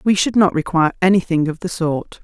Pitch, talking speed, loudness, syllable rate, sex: 175 Hz, 215 wpm, -17 LUFS, 5.9 syllables/s, female